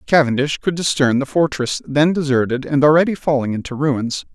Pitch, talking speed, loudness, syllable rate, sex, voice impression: 140 Hz, 165 wpm, -17 LUFS, 5.4 syllables/s, male, very masculine, adult-like, slightly thick, slightly fluent, cool, slightly intellectual, slightly refreshing, slightly friendly